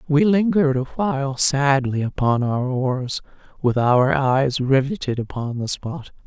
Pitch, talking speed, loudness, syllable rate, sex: 140 Hz, 135 wpm, -20 LUFS, 4.1 syllables/s, female